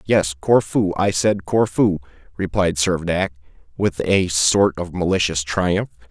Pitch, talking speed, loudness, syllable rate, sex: 90 Hz, 130 wpm, -19 LUFS, 4.1 syllables/s, male